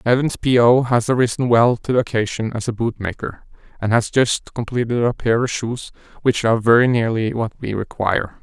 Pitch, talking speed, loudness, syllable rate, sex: 115 Hz, 200 wpm, -18 LUFS, 5.4 syllables/s, male